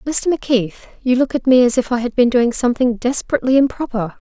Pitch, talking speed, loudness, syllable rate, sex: 250 Hz, 210 wpm, -16 LUFS, 6.6 syllables/s, female